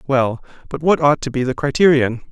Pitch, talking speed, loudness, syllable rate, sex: 135 Hz, 210 wpm, -17 LUFS, 5.5 syllables/s, male